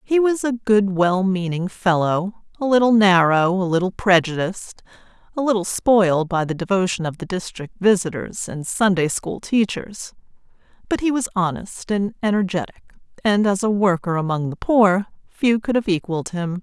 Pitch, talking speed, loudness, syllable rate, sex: 195 Hz, 160 wpm, -20 LUFS, 4.9 syllables/s, female